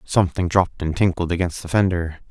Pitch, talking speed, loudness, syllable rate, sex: 90 Hz, 185 wpm, -21 LUFS, 6.1 syllables/s, male